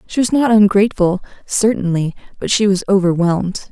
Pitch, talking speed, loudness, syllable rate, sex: 200 Hz, 145 wpm, -15 LUFS, 5.5 syllables/s, female